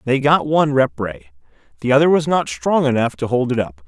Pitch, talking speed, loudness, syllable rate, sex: 130 Hz, 230 wpm, -17 LUFS, 5.8 syllables/s, male